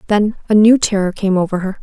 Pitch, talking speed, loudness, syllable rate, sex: 200 Hz, 230 wpm, -14 LUFS, 5.9 syllables/s, female